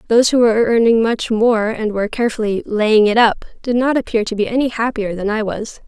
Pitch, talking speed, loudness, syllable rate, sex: 225 Hz, 225 wpm, -16 LUFS, 5.9 syllables/s, female